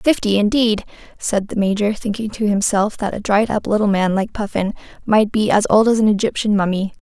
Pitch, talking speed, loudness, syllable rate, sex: 210 Hz, 205 wpm, -18 LUFS, 5.4 syllables/s, female